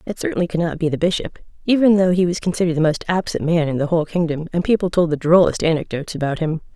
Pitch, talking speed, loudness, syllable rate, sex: 170 Hz, 250 wpm, -19 LUFS, 7.1 syllables/s, female